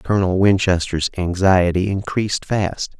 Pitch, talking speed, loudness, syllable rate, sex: 95 Hz, 100 wpm, -18 LUFS, 4.4 syllables/s, male